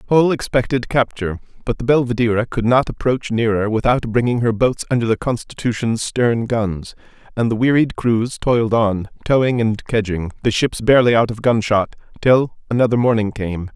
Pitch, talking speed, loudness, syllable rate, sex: 115 Hz, 165 wpm, -18 LUFS, 5.2 syllables/s, male